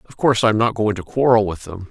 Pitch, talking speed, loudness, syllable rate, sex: 110 Hz, 315 wpm, -18 LUFS, 6.9 syllables/s, male